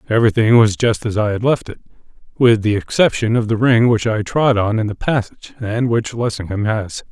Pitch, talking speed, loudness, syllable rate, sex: 110 Hz, 210 wpm, -16 LUFS, 5.4 syllables/s, male